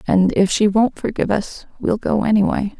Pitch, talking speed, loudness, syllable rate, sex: 205 Hz, 195 wpm, -18 LUFS, 5.2 syllables/s, female